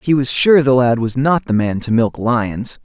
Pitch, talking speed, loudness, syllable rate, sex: 125 Hz, 255 wpm, -15 LUFS, 4.5 syllables/s, male